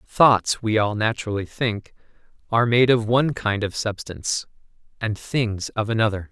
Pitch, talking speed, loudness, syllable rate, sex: 110 Hz, 150 wpm, -22 LUFS, 4.9 syllables/s, male